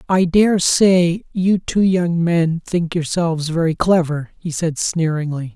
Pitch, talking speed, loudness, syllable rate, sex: 170 Hz, 140 wpm, -17 LUFS, 4.0 syllables/s, male